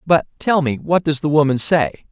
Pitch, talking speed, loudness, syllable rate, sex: 150 Hz, 225 wpm, -17 LUFS, 4.9 syllables/s, male